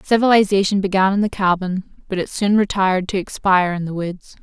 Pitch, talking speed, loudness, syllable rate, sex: 195 Hz, 190 wpm, -18 LUFS, 5.7 syllables/s, female